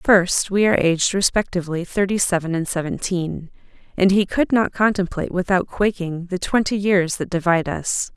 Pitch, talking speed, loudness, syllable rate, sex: 185 Hz, 160 wpm, -20 LUFS, 5.3 syllables/s, female